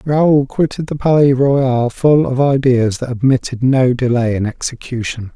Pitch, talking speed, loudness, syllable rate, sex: 130 Hz, 155 wpm, -15 LUFS, 4.4 syllables/s, male